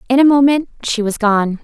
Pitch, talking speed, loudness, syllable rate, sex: 245 Hz, 220 wpm, -14 LUFS, 5.3 syllables/s, female